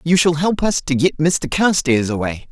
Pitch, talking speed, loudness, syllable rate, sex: 155 Hz, 215 wpm, -17 LUFS, 4.6 syllables/s, male